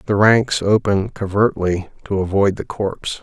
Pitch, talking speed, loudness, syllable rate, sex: 100 Hz, 150 wpm, -18 LUFS, 4.8 syllables/s, male